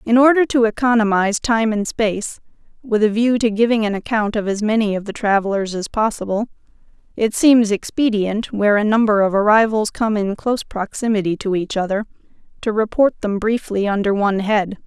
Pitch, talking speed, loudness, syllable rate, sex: 215 Hz, 180 wpm, -18 LUFS, 5.5 syllables/s, female